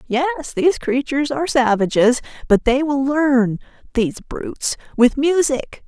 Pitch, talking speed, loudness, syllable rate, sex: 270 Hz, 110 wpm, -18 LUFS, 4.6 syllables/s, female